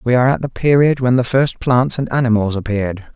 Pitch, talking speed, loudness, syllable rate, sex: 125 Hz, 230 wpm, -16 LUFS, 5.9 syllables/s, male